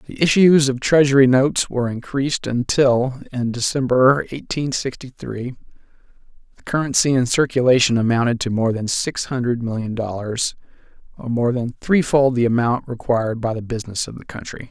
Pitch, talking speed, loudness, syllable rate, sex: 125 Hz, 155 wpm, -19 LUFS, 5.2 syllables/s, male